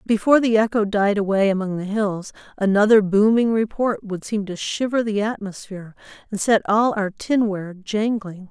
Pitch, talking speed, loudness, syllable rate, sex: 210 Hz, 160 wpm, -20 LUFS, 5.1 syllables/s, female